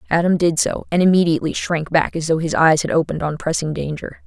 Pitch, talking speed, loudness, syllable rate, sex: 160 Hz, 225 wpm, -18 LUFS, 6.2 syllables/s, female